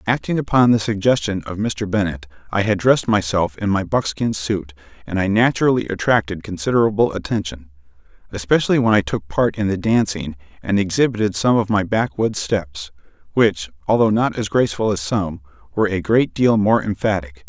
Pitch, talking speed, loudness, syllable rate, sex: 100 Hz, 170 wpm, -19 LUFS, 5.5 syllables/s, male